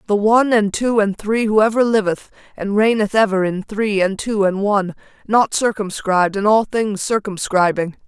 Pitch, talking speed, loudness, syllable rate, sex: 205 Hz, 180 wpm, -17 LUFS, 5.0 syllables/s, female